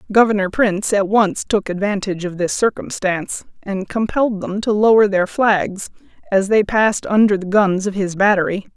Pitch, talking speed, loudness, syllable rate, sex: 200 Hz, 170 wpm, -17 LUFS, 5.1 syllables/s, female